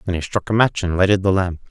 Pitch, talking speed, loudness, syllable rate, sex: 95 Hz, 315 wpm, -18 LUFS, 6.8 syllables/s, male